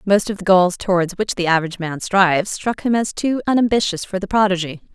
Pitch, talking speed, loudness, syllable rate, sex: 190 Hz, 220 wpm, -18 LUFS, 6.0 syllables/s, female